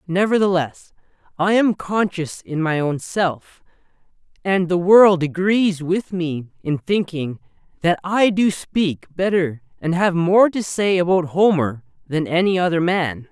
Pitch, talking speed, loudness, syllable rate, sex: 175 Hz, 145 wpm, -19 LUFS, 3.9 syllables/s, male